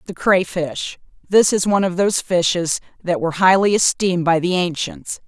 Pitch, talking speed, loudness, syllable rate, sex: 180 Hz, 160 wpm, -18 LUFS, 5.3 syllables/s, female